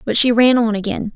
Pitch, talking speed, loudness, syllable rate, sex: 230 Hz, 260 wpm, -15 LUFS, 5.7 syllables/s, female